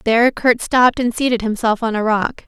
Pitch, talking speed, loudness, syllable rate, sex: 230 Hz, 220 wpm, -16 LUFS, 5.5 syllables/s, female